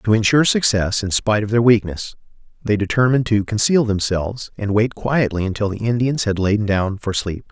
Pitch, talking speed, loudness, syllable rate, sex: 105 Hz, 190 wpm, -18 LUFS, 5.6 syllables/s, male